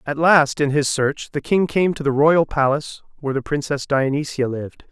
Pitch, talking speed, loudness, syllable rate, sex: 145 Hz, 210 wpm, -19 LUFS, 5.2 syllables/s, male